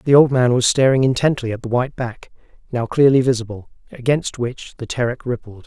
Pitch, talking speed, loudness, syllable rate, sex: 125 Hz, 190 wpm, -18 LUFS, 5.7 syllables/s, male